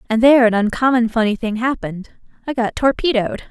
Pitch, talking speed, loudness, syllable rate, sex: 235 Hz, 155 wpm, -17 LUFS, 6.1 syllables/s, female